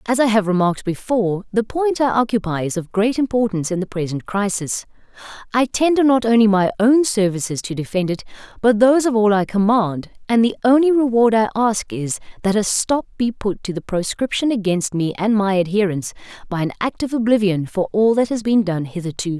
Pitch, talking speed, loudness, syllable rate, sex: 210 Hz, 200 wpm, -18 LUFS, 5.6 syllables/s, female